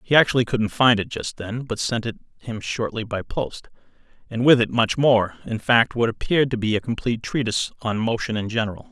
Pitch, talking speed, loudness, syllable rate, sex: 115 Hz, 210 wpm, -22 LUFS, 5.7 syllables/s, male